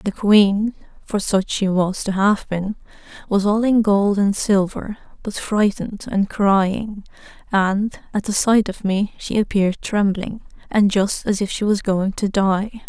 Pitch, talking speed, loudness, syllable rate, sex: 200 Hz, 170 wpm, -19 LUFS, 3.6 syllables/s, female